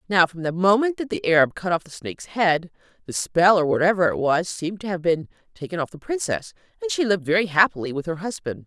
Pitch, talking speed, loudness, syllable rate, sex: 185 Hz, 235 wpm, -22 LUFS, 6.2 syllables/s, female